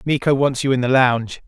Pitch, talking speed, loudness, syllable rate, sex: 130 Hz, 245 wpm, -17 LUFS, 6.0 syllables/s, male